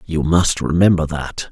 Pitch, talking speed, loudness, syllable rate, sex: 80 Hz, 160 wpm, -17 LUFS, 4.3 syllables/s, male